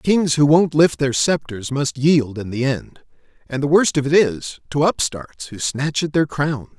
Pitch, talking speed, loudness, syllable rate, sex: 140 Hz, 210 wpm, -18 LUFS, 4.2 syllables/s, male